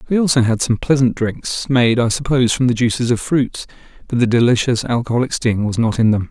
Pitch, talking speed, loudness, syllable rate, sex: 120 Hz, 220 wpm, -16 LUFS, 5.8 syllables/s, male